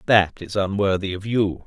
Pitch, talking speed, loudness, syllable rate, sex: 100 Hz, 180 wpm, -22 LUFS, 4.7 syllables/s, male